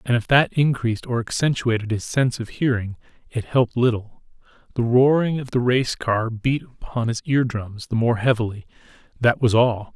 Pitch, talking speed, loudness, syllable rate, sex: 120 Hz, 170 wpm, -21 LUFS, 5.1 syllables/s, male